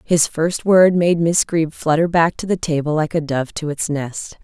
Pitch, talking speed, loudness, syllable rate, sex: 160 Hz, 230 wpm, -18 LUFS, 4.4 syllables/s, female